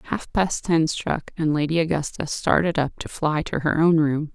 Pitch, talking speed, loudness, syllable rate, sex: 160 Hz, 205 wpm, -22 LUFS, 4.7 syllables/s, female